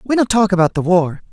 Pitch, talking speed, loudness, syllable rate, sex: 195 Hz, 275 wpm, -15 LUFS, 6.0 syllables/s, male